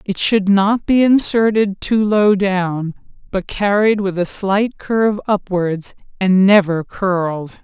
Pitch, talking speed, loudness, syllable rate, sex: 195 Hz, 140 wpm, -16 LUFS, 3.7 syllables/s, female